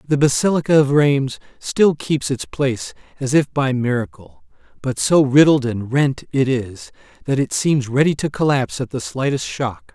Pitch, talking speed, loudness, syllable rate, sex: 135 Hz, 175 wpm, -18 LUFS, 4.7 syllables/s, male